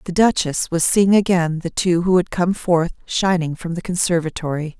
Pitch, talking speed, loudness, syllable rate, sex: 175 Hz, 190 wpm, -18 LUFS, 4.9 syllables/s, female